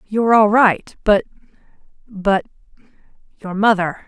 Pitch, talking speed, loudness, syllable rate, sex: 205 Hz, 75 wpm, -16 LUFS, 4.2 syllables/s, female